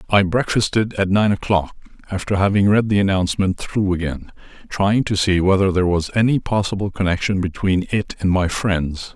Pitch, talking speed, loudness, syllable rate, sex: 95 Hz, 170 wpm, -19 LUFS, 5.3 syllables/s, male